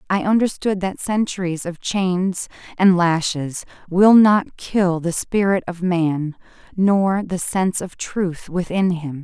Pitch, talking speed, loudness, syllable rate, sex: 180 Hz, 145 wpm, -19 LUFS, 3.7 syllables/s, female